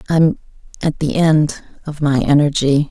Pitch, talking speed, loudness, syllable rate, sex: 150 Hz, 145 wpm, -16 LUFS, 4.3 syllables/s, female